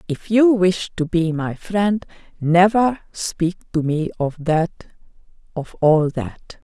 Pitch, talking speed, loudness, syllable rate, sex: 175 Hz, 145 wpm, -19 LUFS, 3.3 syllables/s, female